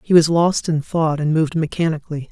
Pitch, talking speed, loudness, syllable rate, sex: 160 Hz, 210 wpm, -18 LUFS, 5.9 syllables/s, male